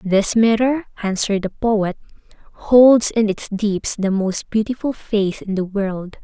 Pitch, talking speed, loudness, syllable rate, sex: 210 Hz, 155 wpm, -18 LUFS, 4.0 syllables/s, female